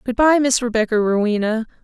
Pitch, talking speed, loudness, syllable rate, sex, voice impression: 235 Hz, 165 wpm, -18 LUFS, 5.7 syllables/s, female, feminine, adult-like, clear, sincere, calm, friendly, slightly kind